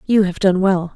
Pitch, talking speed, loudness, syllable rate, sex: 190 Hz, 255 wpm, -16 LUFS, 4.8 syllables/s, female